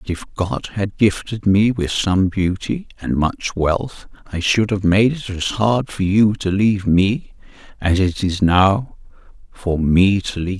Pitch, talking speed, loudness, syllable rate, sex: 100 Hz, 185 wpm, -18 LUFS, 4.0 syllables/s, male